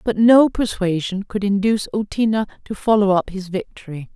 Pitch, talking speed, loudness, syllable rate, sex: 205 Hz, 160 wpm, -19 LUFS, 5.3 syllables/s, female